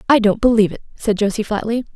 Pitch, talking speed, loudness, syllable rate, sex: 215 Hz, 215 wpm, -17 LUFS, 7.1 syllables/s, female